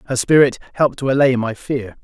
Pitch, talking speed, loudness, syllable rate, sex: 130 Hz, 205 wpm, -17 LUFS, 6.1 syllables/s, male